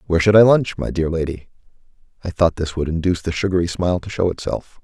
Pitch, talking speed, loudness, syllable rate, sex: 90 Hz, 225 wpm, -19 LUFS, 6.6 syllables/s, male